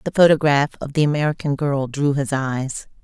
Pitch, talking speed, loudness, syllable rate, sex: 145 Hz, 180 wpm, -20 LUFS, 5.3 syllables/s, female